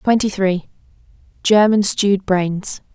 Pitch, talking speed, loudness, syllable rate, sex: 195 Hz, 80 wpm, -17 LUFS, 4.0 syllables/s, female